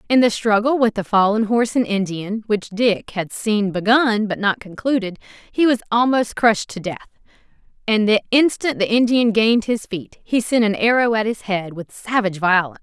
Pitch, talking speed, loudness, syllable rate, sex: 215 Hz, 190 wpm, -18 LUFS, 5.2 syllables/s, female